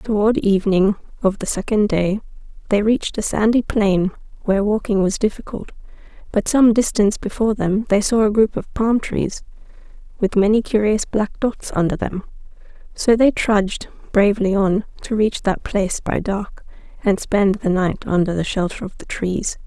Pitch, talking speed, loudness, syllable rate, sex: 205 Hz, 170 wpm, -19 LUFS, 5.0 syllables/s, female